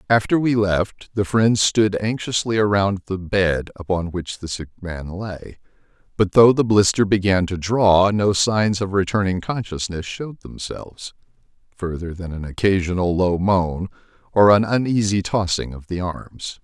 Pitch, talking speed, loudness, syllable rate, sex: 95 Hz, 155 wpm, -20 LUFS, 4.4 syllables/s, male